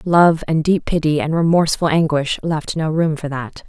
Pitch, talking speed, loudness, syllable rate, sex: 160 Hz, 195 wpm, -17 LUFS, 4.9 syllables/s, female